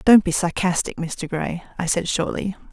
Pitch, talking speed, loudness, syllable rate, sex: 180 Hz, 175 wpm, -22 LUFS, 4.7 syllables/s, female